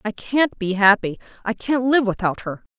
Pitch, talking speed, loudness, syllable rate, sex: 220 Hz, 170 wpm, -20 LUFS, 4.7 syllables/s, female